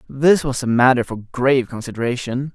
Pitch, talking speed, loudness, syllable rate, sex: 125 Hz, 165 wpm, -18 LUFS, 5.5 syllables/s, male